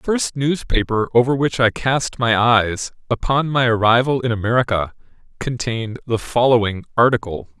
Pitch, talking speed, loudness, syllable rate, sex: 120 Hz, 140 wpm, -18 LUFS, 4.9 syllables/s, male